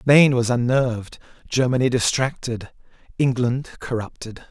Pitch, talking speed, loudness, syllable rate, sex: 125 Hz, 95 wpm, -21 LUFS, 4.5 syllables/s, male